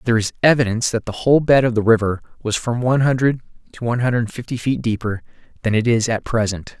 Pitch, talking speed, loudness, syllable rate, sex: 115 Hz, 220 wpm, -19 LUFS, 6.7 syllables/s, male